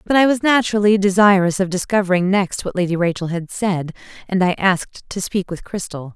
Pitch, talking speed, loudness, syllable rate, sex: 190 Hz, 195 wpm, -18 LUFS, 5.6 syllables/s, female